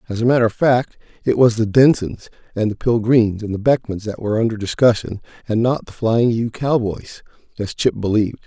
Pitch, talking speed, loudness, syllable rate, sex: 115 Hz, 200 wpm, -18 LUFS, 5.5 syllables/s, male